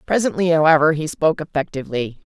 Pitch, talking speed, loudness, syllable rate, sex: 155 Hz, 130 wpm, -18 LUFS, 6.8 syllables/s, female